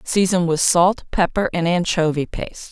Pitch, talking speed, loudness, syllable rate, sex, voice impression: 175 Hz, 155 wpm, -18 LUFS, 4.8 syllables/s, female, feminine, adult-like, tensed, slightly dark, clear, intellectual, calm, reassuring, slightly kind, slightly modest